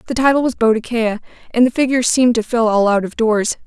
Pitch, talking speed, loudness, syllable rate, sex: 235 Hz, 230 wpm, -16 LUFS, 6.4 syllables/s, female